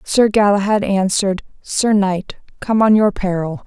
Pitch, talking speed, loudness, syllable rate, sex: 200 Hz, 145 wpm, -16 LUFS, 4.5 syllables/s, female